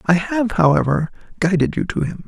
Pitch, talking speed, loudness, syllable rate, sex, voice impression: 180 Hz, 185 wpm, -19 LUFS, 5.4 syllables/s, male, masculine, very adult-like, thick, slightly refreshing, sincere, slightly kind